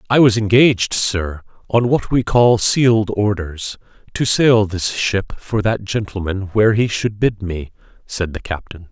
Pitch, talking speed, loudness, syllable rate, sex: 105 Hz, 170 wpm, -17 LUFS, 4.2 syllables/s, male